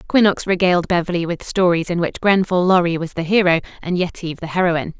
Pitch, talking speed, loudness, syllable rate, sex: 175 Hz, 190 wpm, -18 LUFS, 6.4 syllables/s, female